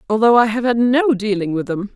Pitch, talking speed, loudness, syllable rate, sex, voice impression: 220 Hz, 245 wpm, -16 LUFS, 5.7 syllables/s, female, very feminine, very adult-like, intellectual, slightly elegant